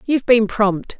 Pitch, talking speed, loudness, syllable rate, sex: 225 Hz, 180 wpm, -16 LUFS, 4.7 syllables/s, female